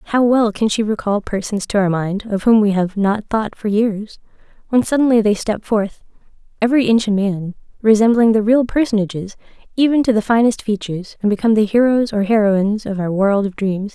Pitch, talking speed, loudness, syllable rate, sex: 215 Hz, 200 wpm, -16 LUFS, 5.6 syllables/s, female